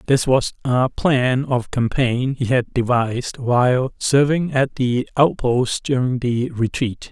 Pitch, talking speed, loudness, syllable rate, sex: 125 Hz, 145 wpm, -19 LUFS, 3.7 syllables/s, male